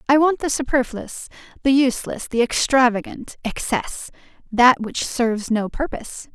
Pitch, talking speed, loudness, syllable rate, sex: 250 Hz, 130 wpm, -20 LUFS, 4.8 syllables/s, female